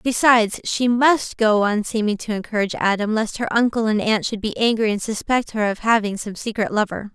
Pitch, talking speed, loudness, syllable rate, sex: 220 Hz, 210 wpm, -20 LUFS, 5.4 syllables/s, female